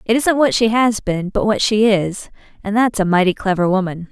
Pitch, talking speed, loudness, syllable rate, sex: 205 Hz, 235 wpm, -16 LUFS, 5.2 syllables/s, female